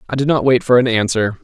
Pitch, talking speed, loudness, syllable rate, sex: 120 Hz, 290 wpm, -15 LUFS, 6.4 syllables/s, male